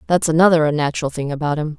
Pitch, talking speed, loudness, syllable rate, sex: 155 Hz, 200 wpm, -17 LUFS, 7.5 syllables/s, female